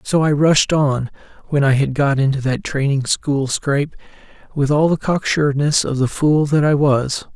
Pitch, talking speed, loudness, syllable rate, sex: 140 Hz, 195 wpm, -17 LUFS, 4.7 syllables/s, male